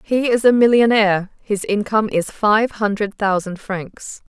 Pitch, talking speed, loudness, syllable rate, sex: 210 Hz, 140 wpm, -17 LUFS, 4.5 syllables/s, female